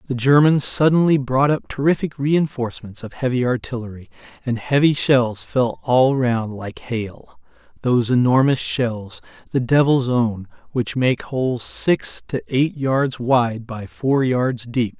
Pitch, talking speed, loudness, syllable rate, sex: 125 Hz, 140 wpm, -19 LUFS, 4.1 syllables/s, male